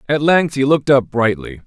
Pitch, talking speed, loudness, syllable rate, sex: 130 Hz, 215 wpm, -15 LUFS, 5.5 syllables/s, male